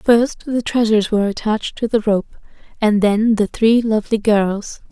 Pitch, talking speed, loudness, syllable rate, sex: 215 Hz, 170 wpm, -17 LUFS, 4.9 syllables/s, female